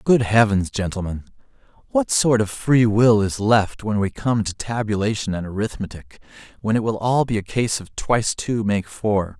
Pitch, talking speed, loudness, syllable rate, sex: 110 Hz, 185 wpm, -20 LUFS, 4.8 syllables/s, male